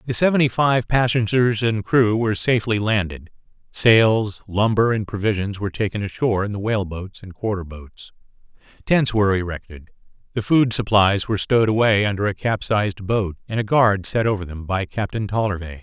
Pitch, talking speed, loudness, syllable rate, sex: 105 Hz, 165 wpm, -20 LUFS, 5.4 syllables/s, male